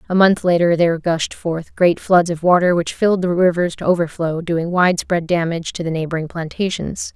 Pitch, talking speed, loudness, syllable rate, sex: 170 Hz, 195 wpm, -18 LUFS, 5.5 syllables/s, female